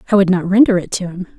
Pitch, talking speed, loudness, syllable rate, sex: 190 Hz, 305 wpm, -14 LUFS, 7.5 syllables/s, female